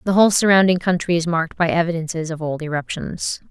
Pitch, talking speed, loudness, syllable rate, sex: 170 Hz, 190 wpm, -19 LUFS, 6.4 syllables/s, female